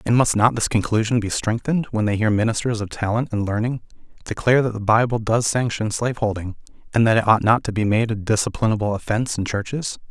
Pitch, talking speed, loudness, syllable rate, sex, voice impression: 110 Hz, 210 wpm, -20 LUFS, 6.3 syllables/s, male, very masculine, very adult-like, very middle-aged, very thick, slightly tensed, powerful, slightly dark, soft, muffled, fluent, very cool, intellectual, very sincere, very calm, very mature, very friendly, very reassuring, very unique, elegant, very wild, sweet, slightly lively, kind, slightly modest